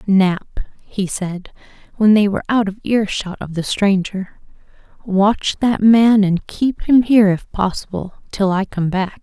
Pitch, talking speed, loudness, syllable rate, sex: 200 Hz, 170 wpm, -17 LUFS, 4.2 syllables/s, female